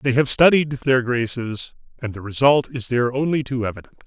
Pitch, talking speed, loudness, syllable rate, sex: 125 Hz, 190 wpm, -20 LUFS, 5.5 syllables/s, male